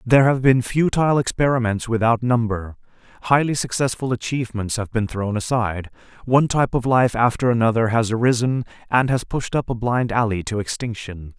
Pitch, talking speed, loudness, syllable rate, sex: 120 Hz, 165 wpm, -20 LUFS, 5.6 syllables/s, male